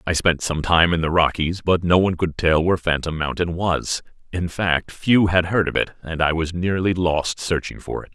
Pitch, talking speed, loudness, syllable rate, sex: 85 Hz, 230 wpm, -20 LUFS, 5.0 syllables/s, male